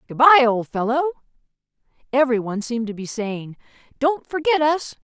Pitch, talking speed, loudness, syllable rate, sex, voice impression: 260 Hz, 155 wpm, -20 LUFS, 6.0 syllables/s, female, very feminine, very adult-like, middle-aged, slightly thin, tensed, slightly powerful, bright, slightly soft, very clear, fluent, cool, intellectual, very refreshing, sincere, very calm, reassuring, slightly elegant, wild, slightly sweet, lively, slightly kind, slightly intense